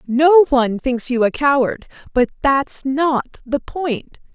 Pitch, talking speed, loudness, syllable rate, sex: 270 Hz, 150 wpm, -17 LUFS, 3.6 syllables/s, female